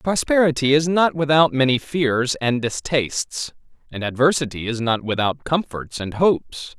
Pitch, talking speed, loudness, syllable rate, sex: 135 Hz, 140 wpm, -20 LUFS, 4.5 syllables/s, male